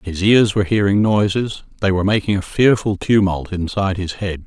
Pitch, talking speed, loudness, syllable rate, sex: 100 Hz, 175 wpm, -17 LUFS, 5.5 syllables/s, male